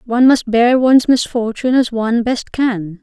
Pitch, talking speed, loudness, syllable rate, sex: 235 Hz, 180 wpm, -14 LUFS, 5.2 syllables/s, female